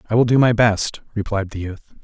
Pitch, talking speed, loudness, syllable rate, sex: 110 Hz, 235 wpm, -19 LUFS, 5.9 syllables/s, male